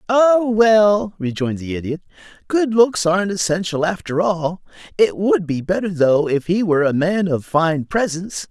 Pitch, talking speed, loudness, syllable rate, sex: 185 Hz, 170 wpm, -18 LUFS, 4.7 syllables/s, male